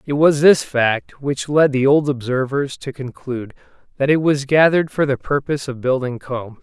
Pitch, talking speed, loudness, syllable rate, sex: 135 Hz, 190 wpm, -18 LUFS, 4.9 syllables/s, male